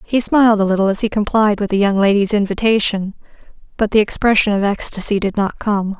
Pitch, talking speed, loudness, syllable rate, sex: 205 Hz, 200 wpm, -15 LUFS, 5.9 syllables/s, female